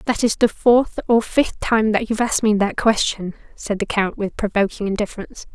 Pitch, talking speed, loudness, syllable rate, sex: 215 Hz, 205 wpm, -19 LUFS, 5.5 syllables/s, female